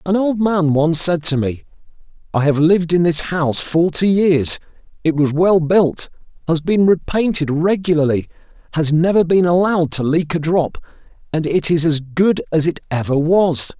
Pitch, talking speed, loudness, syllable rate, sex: 165 Hz, 175 wpm, -16 LUFS, 4.7 syllables/s, male